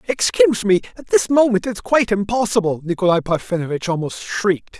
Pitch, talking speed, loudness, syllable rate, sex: 195 Hz, 150 wpm, -18 LUFS, 5.9 syllables/s, male